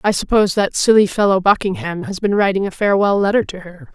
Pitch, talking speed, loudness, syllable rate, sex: 200 Hz, 215 wpm, -16 LUFS, 6.2 syllables/s, female